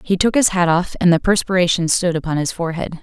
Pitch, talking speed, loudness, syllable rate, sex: 175 Hz, 240 wpm, -17 LUFS, 6.2 syllables/s, female